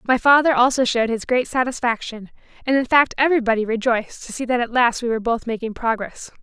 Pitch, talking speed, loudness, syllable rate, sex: 240 Hz, 205 wpm, -19 LUFS, 6.3 syllables/s, female